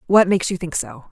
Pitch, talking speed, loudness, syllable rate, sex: 190 Hz, 270 wpm, -19 LUFS, 6.7 syllables/s, female